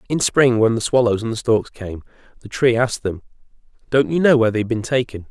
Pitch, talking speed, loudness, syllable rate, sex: 115 Hz, 240 wpm, -18 LUFS, 6.2 syllables/s, male